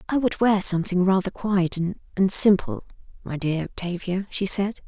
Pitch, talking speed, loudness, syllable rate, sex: 185 Hz, 160 wpm, -22 LUFS, 4.9 syllables/s, female